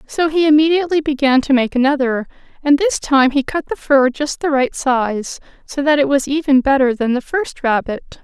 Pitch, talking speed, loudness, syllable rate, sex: 280 Hz, 205 wpm, -16 LUFS, 5.3 syllables/s, female